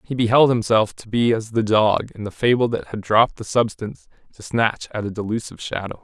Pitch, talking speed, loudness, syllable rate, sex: 110 Hz, 220 wpm, -20 LUFS, 5.7 syllables/s, male